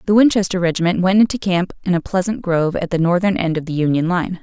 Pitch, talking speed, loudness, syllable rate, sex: 180 Hz, 245 wpm, -17 LUFS, 6.5 syllables/s, female